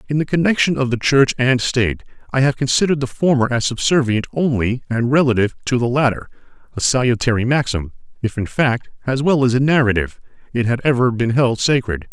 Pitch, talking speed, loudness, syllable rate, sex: 125 Hz, 190 wpm, -17 LUFS, 6.0 syllables/s, male